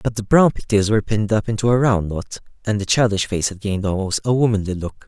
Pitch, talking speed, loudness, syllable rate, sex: 105 Hz, 260 wpm, -19 LUFS, 6.4 syllables/s, male